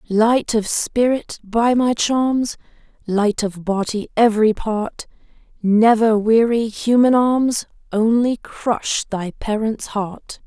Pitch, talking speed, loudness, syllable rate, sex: 225 Hz, 115 wpm, -18 LUFS, 3.3 syllables/s, female